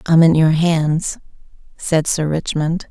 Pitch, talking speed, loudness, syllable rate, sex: 160 Hz, 145 wpm, -16 LUFS, 3.6 syllables/s, female